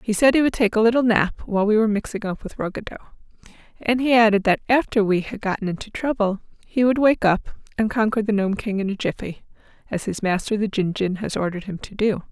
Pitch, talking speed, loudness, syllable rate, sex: 210 Hz, 230 wpm, -21 LUFS, 6.1 syllables/s, female